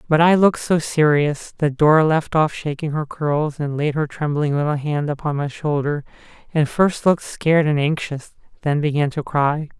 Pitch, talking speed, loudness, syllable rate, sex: 150 Hz, 190 wpm, -19 LUFS, 4.9 syllables/s, male